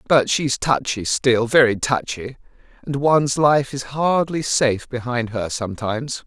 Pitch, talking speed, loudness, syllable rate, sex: 130 Hz, 145 wpm, -20 LUFS, 4.5 syllables/s, male